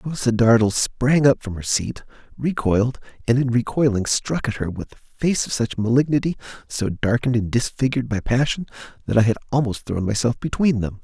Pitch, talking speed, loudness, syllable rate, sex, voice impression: 120 Hz, 185 wpm, -21 LUFS, 5.6 syllables/s, male, masculine, adult-like, tensed, bright, slightly raspy, slightly refreshing, friendly, slightly reassuring, unique, wild, lively, kind